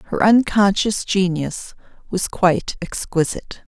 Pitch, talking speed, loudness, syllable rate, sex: 195 Hz, 95 wpm, -19 LUFS, 4.0 syllables/s, female